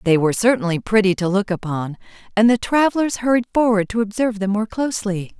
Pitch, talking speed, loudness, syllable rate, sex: 210 Hz, 190 wpm, -19 LUFS, 6.2 syllables/s, female